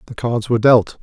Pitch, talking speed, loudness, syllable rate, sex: 115 Hz, 235 wpm, -16 LUFS, 6.0 syllables/s, male